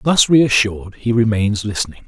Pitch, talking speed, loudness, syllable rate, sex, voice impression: 115 Hz, 145 wpm, -16 LUFS, 5.2 syllables/s, male, very masculine, slightly old, very thick, tensed, slightly powerful, slightly bright, soft, slightly muffled, fluent, raspy, cool, intellectual, slightly refreshing, sincere, calm, very mature, very friendly, reassuring, very unique, elegant, very wild, sweet, lively, kind, slightly intense